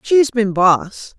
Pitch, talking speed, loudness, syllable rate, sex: 220 Hz, 150 wpm, -15 LUFS, 2.8 syllables/s, female